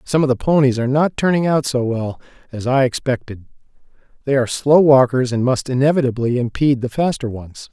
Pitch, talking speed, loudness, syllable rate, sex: 130 Hz, 185 wpm, -17 LUFS, 5.9 syllables/s, male